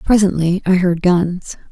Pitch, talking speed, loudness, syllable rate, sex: 180 Hz, 140 wpm, -15 LUFS, 4.1 syllables/s, female